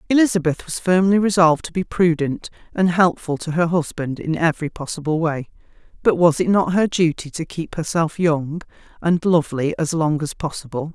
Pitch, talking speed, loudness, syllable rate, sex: 165 Hz, 175 wpm, -20 LUFS, 5.3 syllables/s, female